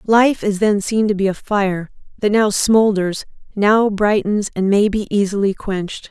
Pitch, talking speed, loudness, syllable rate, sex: 205 Hz, 175 wpm, -17 LUFS, 4.3 syllables/s, female